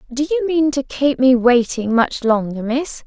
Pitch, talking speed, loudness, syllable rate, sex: 265 Hz, 195 wpm, -17 LUFS, 4.4 syllables/s, female